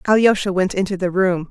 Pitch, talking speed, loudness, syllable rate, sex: 190 Hz, 200 wpm, -18 LUFS, 5.8 syllables/s, female